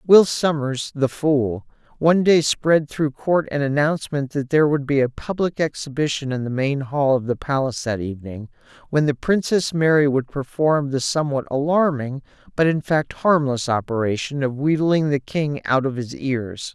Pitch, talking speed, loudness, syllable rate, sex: 140 Hz, 175 wpm, -21 LUFS, 4.9 syllables/s, male